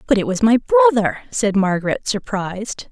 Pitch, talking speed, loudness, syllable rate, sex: 190 Hz, 165 wpm, -18 LUFS, 5.6 syllables/s, female